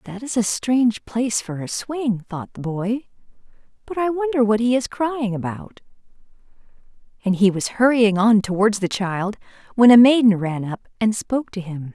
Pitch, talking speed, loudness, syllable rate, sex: 220 Hz, 180 wpm, -20 LUFS, 4.9 syllables/s, female